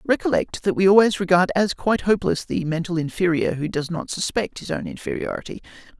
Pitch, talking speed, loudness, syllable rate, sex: 180 Hz, 180 wpm, -21 LUFS, 6.0 syllables/s, male